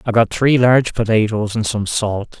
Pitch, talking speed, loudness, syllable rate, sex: 110 Hz, 200 wpm, -16 LUFS, 4.9 syllables/s, male